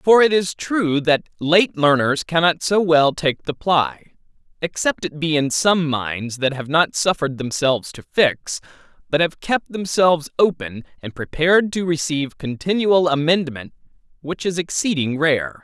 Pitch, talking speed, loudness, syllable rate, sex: 155 Hz, 155 wpm, -19 LUFS, 4.5 syllables/s, male